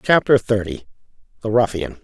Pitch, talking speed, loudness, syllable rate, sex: 120 Hz, 90 wpm, -18 LUFS, 5.2 syllables/s, male